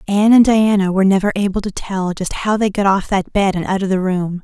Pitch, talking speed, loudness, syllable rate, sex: 195 Hz, 270 wpm, -16 LUFS, 5.9 syllables/s, female